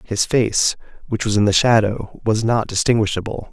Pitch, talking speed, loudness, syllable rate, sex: 110 Hz, 170 wpm, -18 LUFS, 4.9 syllables/s, male